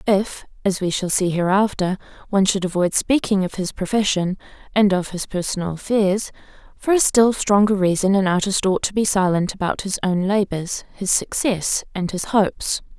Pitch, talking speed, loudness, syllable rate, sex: 195 Hz, 175 wpm, -20 LUFS, 5.0 syllables/s, female